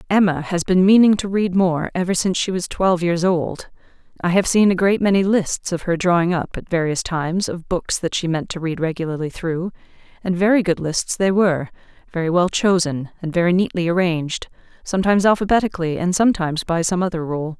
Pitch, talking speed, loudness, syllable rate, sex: 180 Hz, 190 wpm, -19 LUFS, 5.8 syllables/s, female